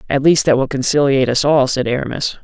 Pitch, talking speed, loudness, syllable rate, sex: 135 Hz, 220 wpm, -15 LUFS, 6.3 syllables/s, male